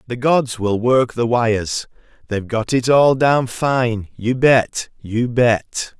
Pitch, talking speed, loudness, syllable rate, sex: 120 Hz, 160 wpm, -17 LUFS, 3.5 syllables/s, male